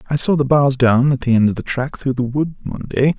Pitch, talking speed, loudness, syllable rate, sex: 135 Hz, 300 wpm, -17 LUFS, 5.9 syllables/s, male